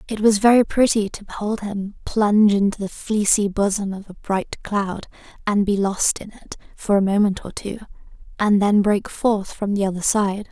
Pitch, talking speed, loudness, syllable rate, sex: 205 Hz, 195 wpm, -20 LUFS, 4.7 syllables/s, female